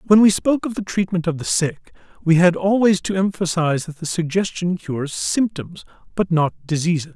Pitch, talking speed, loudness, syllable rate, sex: 175 Hz, 185 wpm, -19 LUFS, 5.4 syllables/s, male